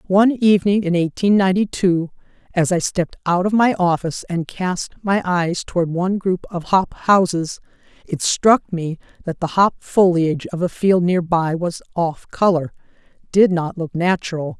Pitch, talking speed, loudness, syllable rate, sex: 180 Hz, 170 wpm, -18 LUFS, 4.8 syllables/s, female